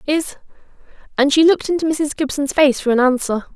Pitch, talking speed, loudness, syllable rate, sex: 285 Hz, 185 wpm, -17 LUFS, 6.0 syllables/s, female